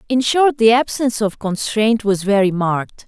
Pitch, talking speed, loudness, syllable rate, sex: 220 Hz, 175 wpm, -16 LUFS, 4.8 syllables/s, female